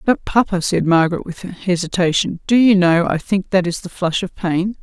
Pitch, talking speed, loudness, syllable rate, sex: 180 Hz, 210 wpm, -17 LUFS, 5.0 syllables/s, female